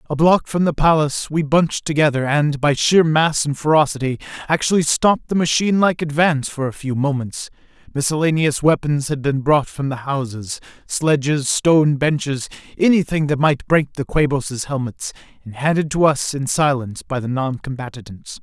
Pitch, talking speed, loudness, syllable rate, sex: 145 Hz, 155 wpm, -18 LUFS, 5.2 syllables/s, male